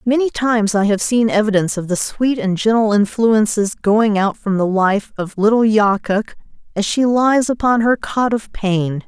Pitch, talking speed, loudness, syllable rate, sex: 215 Hz, 185 wpm, -16 LUFS, 4.7 syllables/s, female